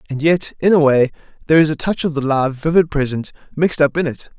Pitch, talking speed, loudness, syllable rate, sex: 150 Hz, 245 wpm, -17 LUFS, 6.4 syllables/s, male